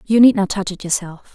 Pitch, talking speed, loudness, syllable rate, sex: 195 Hz, 270 wpm, -17 LUFS, 5.6 syllables/s, female